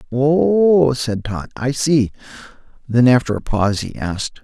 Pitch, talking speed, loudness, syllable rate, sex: 125 Hz, 150 wpm, -17 LUFS, 4.3 syllables/s, male